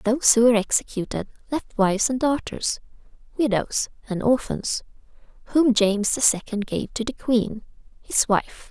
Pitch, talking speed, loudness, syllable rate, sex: 230 Hz, 145 wpm, -22 LUFS, 4.9 syllables/s, female